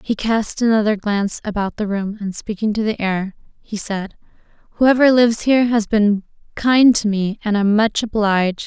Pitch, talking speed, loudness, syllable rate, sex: 215 Hz, 180 wpm, -17 LUFS, 4.9 syllables/s, female